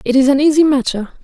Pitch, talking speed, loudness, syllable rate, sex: 275 Hz, 245 wpm, -13 LUFS, 6.6 syllables/s, female